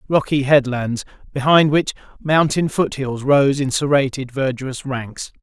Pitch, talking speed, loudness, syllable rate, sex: 140 Hz, 120 wpm, -18 LUFS, 4.5 syllables/s, male